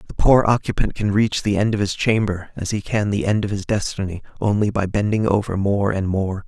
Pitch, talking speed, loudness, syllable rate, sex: 100 Hz, 230 wpm, -20 LUFS, 5.5 syllables/s, male